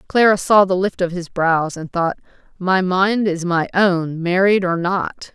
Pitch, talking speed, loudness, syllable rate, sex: 180 Hz, 190 wpm, -18 LUFS, 4.0 syllables/s, female